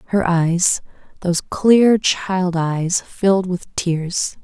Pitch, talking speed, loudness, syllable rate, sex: 180 Hz, 120 wpm, -18 LUFS, 3.0 syllables/s, female